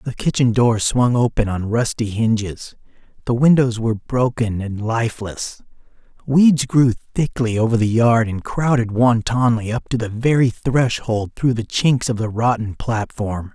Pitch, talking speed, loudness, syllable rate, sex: 115 Hz, 155 wpm, -18 LUFS, 4.3 syllables/s, male